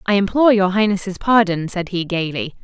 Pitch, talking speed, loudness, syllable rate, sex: 195 Hz, 180 wpm, -17 LUFS, 5.4 syllables/s, female